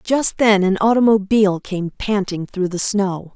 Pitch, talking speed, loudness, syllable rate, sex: 200 Hz, 160 wpm, -17 LUFS, 4.3 syllables/s, female